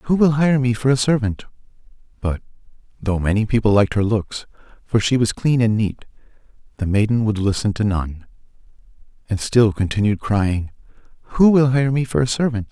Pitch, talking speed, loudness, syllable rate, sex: 115 Hz, 175 wpm, -19 LUFS, 5.4 syllables/s, male